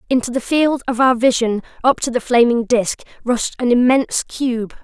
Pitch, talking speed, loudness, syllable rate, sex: 245 Hz, 185 wpm, -17 LUFS, 4.9 syllables/s, female